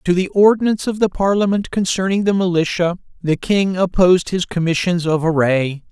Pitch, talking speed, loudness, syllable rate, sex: 185 Hz, 160 wpm, -17 LUFS, 5.4 syllables/s, male